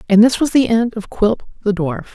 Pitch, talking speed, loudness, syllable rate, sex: 215 Hz, 250 wpm, -16 LUFS, 5.2 syllables/s, female